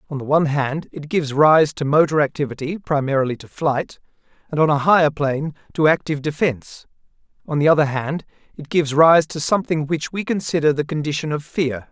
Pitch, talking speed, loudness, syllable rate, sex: 150 Hz, 185 wpm, -19 LUFS, 5.9 syllables/s, male